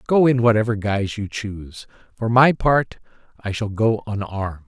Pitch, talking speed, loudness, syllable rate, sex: 110 Hz, 165 wpm, -20 LUFS, 5.1 syllables/s, male